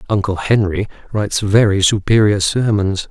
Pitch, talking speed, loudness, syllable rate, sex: 100 Hz, 115 wpm, -15 LUFS, 4.8 syllables/s, male